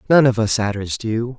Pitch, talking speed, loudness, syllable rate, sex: 115 Hz, 215 wpm, -19 LUFS, 5.0 syllables/s, male